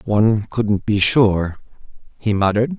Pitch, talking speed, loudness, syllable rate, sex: 105 Hz, 130 wpm, -17 LUFS, 4.4 syllables/s, male